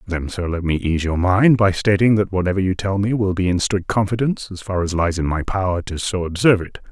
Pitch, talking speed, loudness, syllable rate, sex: 95 Hz, 260 wpm, -19 LUFS, 5.9 syllables/s, male